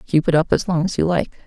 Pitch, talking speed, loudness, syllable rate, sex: 165 Hz, 325 wpm, -19 LUFS, 6.6 syllables/s, female